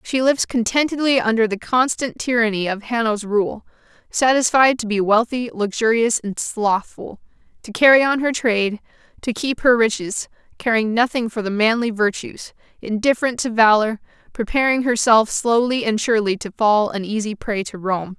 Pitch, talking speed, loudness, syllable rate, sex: 225 Hz, 155 wpm, -18 LUFS, 5.0 syllables/s, female